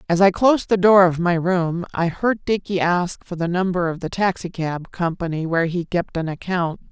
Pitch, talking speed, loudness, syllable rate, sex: 175 Hz, 210 wpm, -20 LUFS, 5.1 syllables/s, female